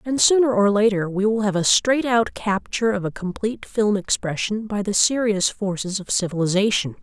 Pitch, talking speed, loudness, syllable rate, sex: 210 Hz, 190 wpm, -20 LUFS, 5.2 syllables/s, female